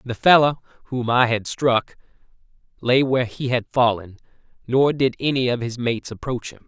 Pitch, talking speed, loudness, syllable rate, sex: 125 Hz, 170 wpm, -20 LUFS, 5.1 syllables/s, male